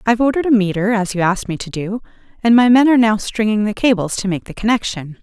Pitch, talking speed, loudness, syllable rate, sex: 215 Hz, 255 wpm, -16 LUFS, 6.8 syllables/s, female